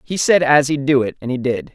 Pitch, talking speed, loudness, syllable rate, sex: 140 Hz, 310 wpm, -16 LUFS, 5.6 syllables/s, male